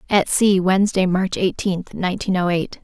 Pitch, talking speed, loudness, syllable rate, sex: 185 Hz, 170 wpm, -19 LUFS, 5.1 syllables/s, female